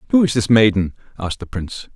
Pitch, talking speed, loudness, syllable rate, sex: 110 Hz, 215 wpm, -18 LUFS, 7.0 syllables/s, male